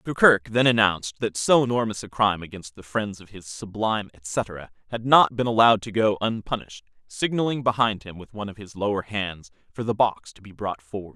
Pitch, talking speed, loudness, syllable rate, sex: 105 Hz, 205 wpm, -23 LUFS, 5.9 syllables/s, male